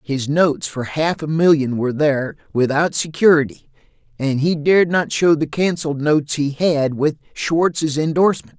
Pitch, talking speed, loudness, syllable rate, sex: 150 Hz, 160 wpm, -18 LUFS, 4.9 syllables/s, male